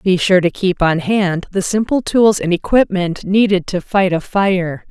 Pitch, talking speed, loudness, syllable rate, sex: 185 Hz, 195 wpm, -15 LUFS, 4.2 syllables/s, female